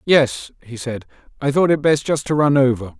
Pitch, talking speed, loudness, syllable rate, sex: 135 Hz, 220 wpm, -18 LUFS, 5.1 syllables/s, male